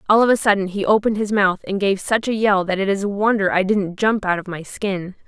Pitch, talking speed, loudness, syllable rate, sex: 200 Hz, 285 wpm, -19 LUFS, 5.8 syllables/s, female